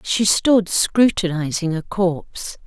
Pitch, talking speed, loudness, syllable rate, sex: 185 Hz, 115 wpm, -18 LUFS, 3.6 syllables/s, female